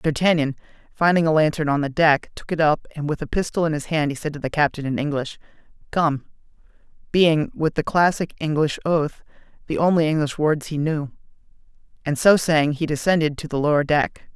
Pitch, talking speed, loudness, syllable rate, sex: 155 Hz, 190 wpm, -21 LUFS, 4.3 syllables/s, male